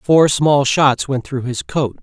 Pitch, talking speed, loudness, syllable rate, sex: 135 Hz, 205 wpm, -16 LUFS, 3.5 syllables/s, male